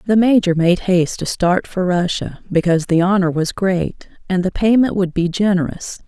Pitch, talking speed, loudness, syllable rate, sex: 185 Hz, 190 wpm, -17 LUFS, 5.0 syllables/s, female